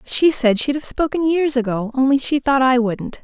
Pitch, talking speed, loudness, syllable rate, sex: 265 Hz, 225 wpm, -18 LUFS, 4.8 syllables/s, female